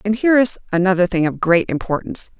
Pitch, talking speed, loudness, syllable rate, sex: 195 Hz, 200 wpm, -17 LUFS, 6.6 syllables/s, female